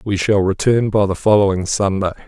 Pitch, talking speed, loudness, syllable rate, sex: 100 Hz, 185 wpm, -16 LUFS, 5.4 syllables/s, male